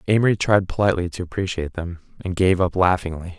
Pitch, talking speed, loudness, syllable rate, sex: 90 Hz, 175 wpm, -21 LUFS, 6.6 syllables/s, male